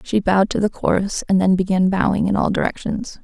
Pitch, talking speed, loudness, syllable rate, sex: 195 Hz, 225 wpm, -19 LUFS, 5.8 syllables/s, female